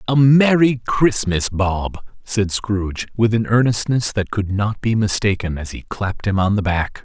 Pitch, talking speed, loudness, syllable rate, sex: 105 Hz, 180 wpm, -18 LUFS, 4.5 syllables/s, male